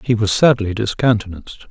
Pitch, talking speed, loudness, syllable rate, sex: 110 Hz, 140 wpm, -16 LUFS, 5.7 syllables/s, male